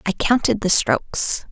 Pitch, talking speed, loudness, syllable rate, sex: 190 Hz, 160 wpm, -18 LUFS, 4.4 syllables/s, female